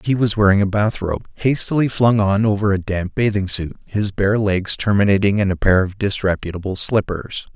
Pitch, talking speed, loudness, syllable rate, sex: 100 Hz, 185 wpm, -18 LUFS, 5.3 syllables/s, male